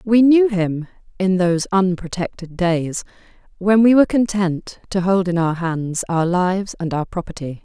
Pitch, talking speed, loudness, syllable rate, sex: 185 Hz, 165 wpm, -18 LUFS, 4.6 syllables/s, female